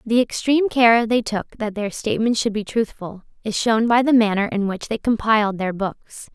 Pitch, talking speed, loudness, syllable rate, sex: 220 Hz, 210 wpm, -20 LUFS, 5.0 syllables/s, female